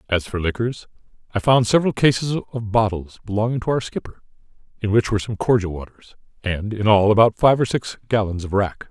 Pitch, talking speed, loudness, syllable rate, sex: 110 Hz, 195 wpm, -20 LUFS, 5.8 syllables/s, male